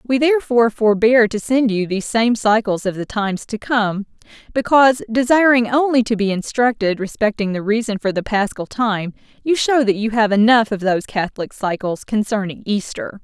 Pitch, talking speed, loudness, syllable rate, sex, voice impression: 220 Hz, 175 wpm, -17 LUFS, 5.3 syllables/s, female, feminine, adult-like, tensed, powerful, bright, clear, fluent, intellectual, friendly, elegant, lively, slightly intense, slightly sharp